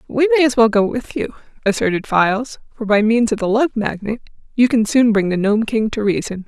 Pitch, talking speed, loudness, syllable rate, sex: 225 Hz, 230 wpm, -17 LUFS, 5.5 syllables/s, female